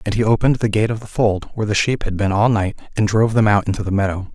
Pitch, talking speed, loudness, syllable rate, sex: 105 Hz, 305 wpm, -18 LUFS, 7.0 syllables/s, male